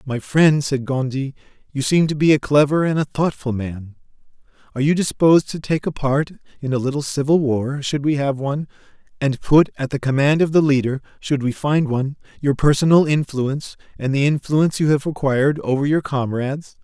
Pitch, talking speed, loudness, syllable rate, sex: 140 Hz, 190 wpm, -19 LUFS, 5.5 syllables/s, male